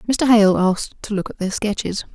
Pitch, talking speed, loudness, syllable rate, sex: 205 Hz, 225 wpm, -19 LUFS, 5.7 syllables/s, female